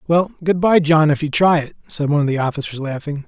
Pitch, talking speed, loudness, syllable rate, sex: 155 Hz, 255 wpm, -17 LUFS, 6.3 syllables/s, male